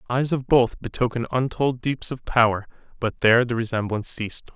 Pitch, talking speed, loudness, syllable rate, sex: 120 Hz, 170 wpm, -23 LUFS, 5.8 syllables/s, male